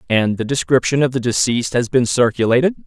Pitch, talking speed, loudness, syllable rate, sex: 125 Hz, 190 wpm, -17 LUFS, 6.1 syllables/s, male